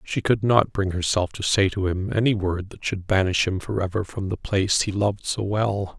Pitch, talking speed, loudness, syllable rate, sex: 100 Hz, 230 wpm, -23 LUFS, 5.1 syllables/s, male